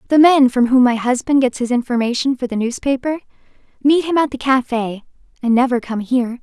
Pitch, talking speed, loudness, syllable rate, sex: 255 Hz, 195 wpm, -16 LUFS, 5.8 syllables/s, female